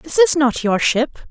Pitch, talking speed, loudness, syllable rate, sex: 280 Hz, 230 wpm, -16 LUFS, 3.9 syllables/s, female